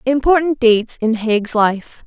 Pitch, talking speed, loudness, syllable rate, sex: 240 Hz, 145 wpm, -15 LUFS, 4.2 syllables/s, female